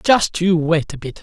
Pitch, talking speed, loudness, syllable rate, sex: 170 Hz, 245 wpm, -17 LUFS, 4.2 syllables/s, male